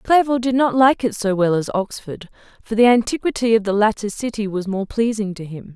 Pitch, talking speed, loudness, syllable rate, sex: 220 Hz, 220 wpm, -19 LUFS, 5.4 syllables/s, female